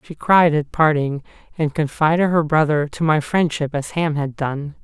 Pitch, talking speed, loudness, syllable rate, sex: 155 Hz, 185 wpm, -19 LUFS, 4.7 syllables/s, male